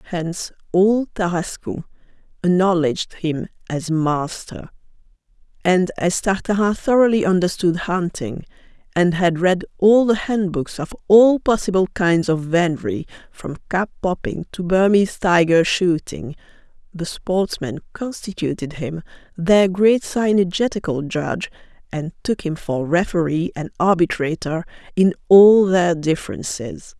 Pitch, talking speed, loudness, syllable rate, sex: 180 Hz, 115 wpm, -19 LUFS, 4.3 syllables/s, female